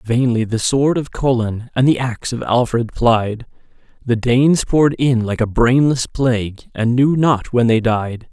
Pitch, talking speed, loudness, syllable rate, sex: 120 Hz, 180 wpm, -16 LUFS, 4.4 syllables/s, male